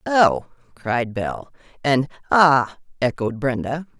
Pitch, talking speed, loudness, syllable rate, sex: 135 Hz, 105 wpm, -20 LUFS, 3.8 syllables/s, female